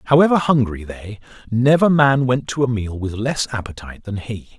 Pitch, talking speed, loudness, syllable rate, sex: 120 Hz, 185 wpm, -18 LUFS, 5.3 syllables/s, male